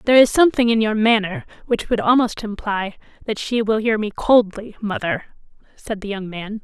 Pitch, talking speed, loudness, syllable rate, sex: 220 Hz, 190 wpm, -19 LUFS, 5.2 syllables/s, female